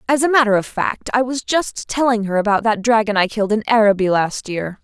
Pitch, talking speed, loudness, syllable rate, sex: 220 Hz, 235 wpm, -17 LUFS, 5.7 syllables/s, female